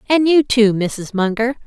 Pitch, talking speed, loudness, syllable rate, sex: 230 Hz, 180 wpm, -16 LUFS, 4.4 syllables/s, female